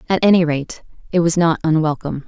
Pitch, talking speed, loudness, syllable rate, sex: 165 Hz, 185 wpm, -17 LUFS, 6.2 syllables/s, female